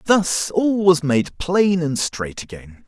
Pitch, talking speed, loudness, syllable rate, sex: 165 Hz, 165 wpm, -19 LUFS, 3.3 syllables/s, male